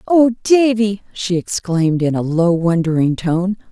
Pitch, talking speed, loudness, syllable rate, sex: 190 Hz, 145 wpm, -16 LUFS, 4.2 syllables/s, female